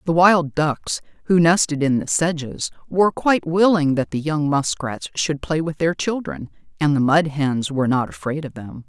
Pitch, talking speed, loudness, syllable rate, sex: 150 Hz, 195 wpm, -20 LUFS, 4.8 syllables/s, female